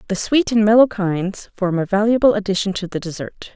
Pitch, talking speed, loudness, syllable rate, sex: 200 Hz, 205 wpm, -18 LUFS, 5.5 syllables/s, female